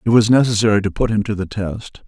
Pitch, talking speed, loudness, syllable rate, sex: 105 Hz, 260 wpm, -17 LUFS, 6.1 syllables/s, male